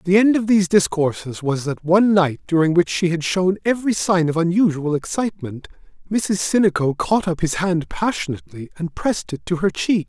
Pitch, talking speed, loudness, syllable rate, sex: 180 Hz, 190 wpm, -19 LUFS, 5.5 syllables/s, male